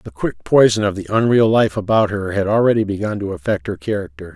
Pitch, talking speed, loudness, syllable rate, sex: 105 Hz, 220 wpm, -17 LUFS, 6.1 syllables/s, male